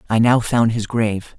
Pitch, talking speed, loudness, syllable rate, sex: 110 Hz, 215 wpm, -18 LUFS, 5.0 syllables/s, male